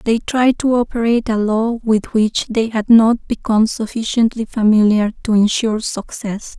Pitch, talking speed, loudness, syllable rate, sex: 225 Hz, 155 wpm, -16 LUFS, 4.8 syllables/s, female